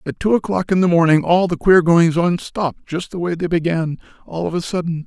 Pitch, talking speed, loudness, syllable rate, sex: 170 Hz, 235 wpm, -17 LUFS, 5.6 syllables/s, male